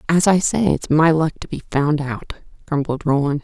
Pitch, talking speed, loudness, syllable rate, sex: 155 Hz, 210 wpm, -18 LUFS, 4.7 syllables/s, female